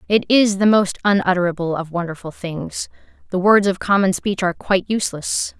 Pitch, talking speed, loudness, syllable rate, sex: 190 Hz, 170 wpm, -18 LUFS, 5.5 syllables/s, female